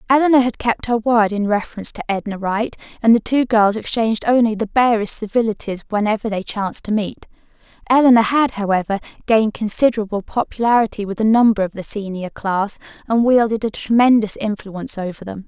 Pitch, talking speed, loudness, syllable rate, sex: 215 Hz, 170 wpm, -18 LUFS, 5.9 syllables/s, female